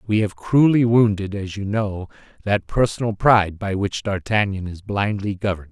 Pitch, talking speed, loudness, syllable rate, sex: 100 Hz, 170 wpm, -20 LUFS, 5.0 syllables/s, male